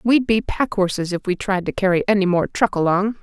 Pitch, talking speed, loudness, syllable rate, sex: 195 Hz, 240 wpm, -19 LUFS, 5.4 syllables/s, female